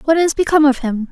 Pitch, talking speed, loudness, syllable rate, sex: 290 Hz, 270 wpm, -15 LUFS, 7.1 syllables/s, female